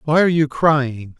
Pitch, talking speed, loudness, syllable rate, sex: 145 Hz, 200 wpm, -17 LUFS, 4.7 syllables/s, male